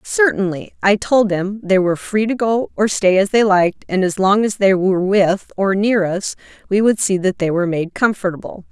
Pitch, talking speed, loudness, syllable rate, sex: 195 Hz, 220 wpm, -16 LUFS, 5.1 syllables/s, female